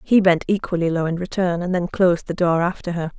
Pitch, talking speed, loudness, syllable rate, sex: 175 Hz, 245 wpm, -20 LUFS, 5.9 syllables/s, female